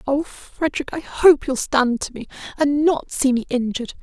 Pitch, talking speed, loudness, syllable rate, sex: 275 Hz, 195 wpm, -20 LUFS, 4.8 syllables/s, female